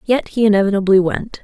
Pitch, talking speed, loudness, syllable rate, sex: 205 Hz, 170 wpm, -15 LUFS, 6.0 syllables/s, female